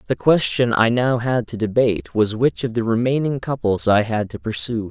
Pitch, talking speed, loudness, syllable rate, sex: 115 Hz, 210 wpm, -19 LUFS, 5.1 syllables/s, male